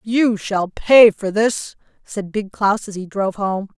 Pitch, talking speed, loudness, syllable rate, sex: 205 Hz, 190 wpm, -17 LUFS, 3.9 syllables/s, female